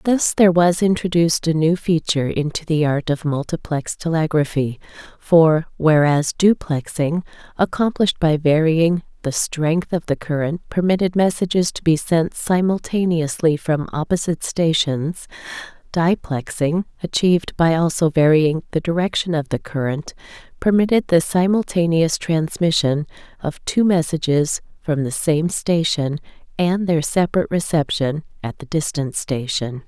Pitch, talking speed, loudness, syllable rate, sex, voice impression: 160 Hz, 125 wpm, -19 LUFS, 3.8 syllables/s, female, feminine, adult-like, slightly clear, slightly cool, sincere, calm, elegant, slightly kind